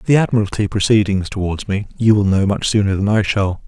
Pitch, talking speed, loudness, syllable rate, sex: 100 Hz, 210 wpm, -17 LUFS, 5.7 syllables/s, male